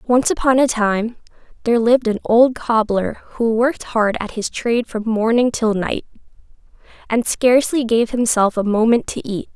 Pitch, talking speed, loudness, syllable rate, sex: 230 Hz, 170 wpm, -17 LUFS, 4.8 syllables/s, female